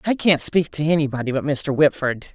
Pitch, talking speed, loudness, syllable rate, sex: 145 Hz, 205 wpm, -20 LUFS, 5.5 syllables/s, female